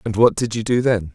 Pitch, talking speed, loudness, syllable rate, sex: 110 Hz, 315 wpm, -18 LUFS, 5.7 syllables/s, male